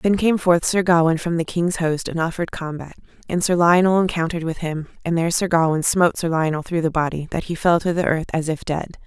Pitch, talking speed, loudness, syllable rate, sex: 170 Hz, 245 wpm, -20 LUFS, 5.9 syllables/s, female